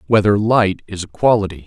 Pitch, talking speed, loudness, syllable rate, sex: 100 Hz, 180 wpm, -16 LUFS, 5.4 syllables/s, male